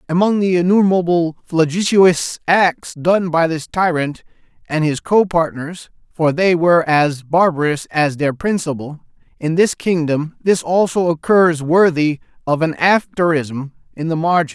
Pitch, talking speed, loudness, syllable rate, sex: 165 Hz, 140 wpm, -16 LUFS, 3.5 syllables/s, male